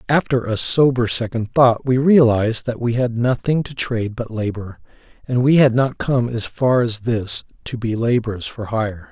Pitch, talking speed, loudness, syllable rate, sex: 120 Hz, 190 wpm, -18 LUFS, 4.7 syllables/s, male